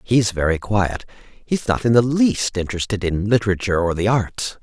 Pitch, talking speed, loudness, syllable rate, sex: 105 Hz, 180 wpm, -19 LUFS, 5.1 syllables/s, male